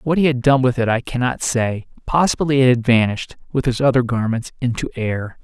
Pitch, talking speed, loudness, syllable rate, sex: 125 Hz, 210 wpm, -18 LUFS, 5.5 syllables/s, male